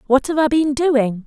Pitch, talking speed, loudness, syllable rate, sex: 275 Hz, 235 wpm, -17 LUFS, 4.5 syllables/s, female